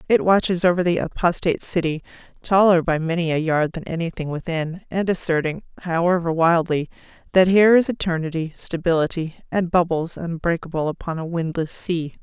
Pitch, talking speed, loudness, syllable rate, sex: 170 Hz, 145 wpm, -21 LUFS, 5.5 syllables/s, female